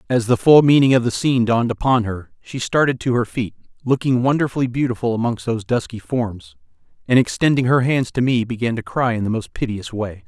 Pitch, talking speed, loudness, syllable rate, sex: 120 Hz, 210 wpm, -19 LUFS, 5.9 syllables/s, male